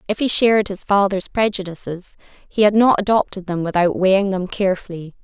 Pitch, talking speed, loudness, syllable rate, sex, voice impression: 195 Hz, 170 wpm, -18 LUFS, 5.6 syllables/s, female, feminine, adult-like, tensed, powerful, clear, fluent, nasal, intellectual, calm, reassuring, elegant, lively, slightly strict